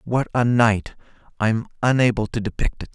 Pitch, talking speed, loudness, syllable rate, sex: 115 Hz, 165 wpm, -21 LUFS, 5.1 syllables/s, male